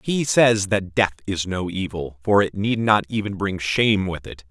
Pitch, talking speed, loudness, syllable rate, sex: 100 Hz, 215 wpm, -21 LUFS, 4.6 syllables/s, male